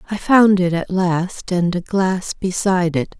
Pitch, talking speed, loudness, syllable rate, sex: 185 Hz, 190 wpm, -18 LUFS, 4.2 syllables/s, female